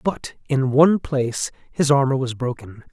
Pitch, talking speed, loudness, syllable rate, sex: 135 Hz, 165 wpm, -20 LUFS, 4.9 syllables/s, male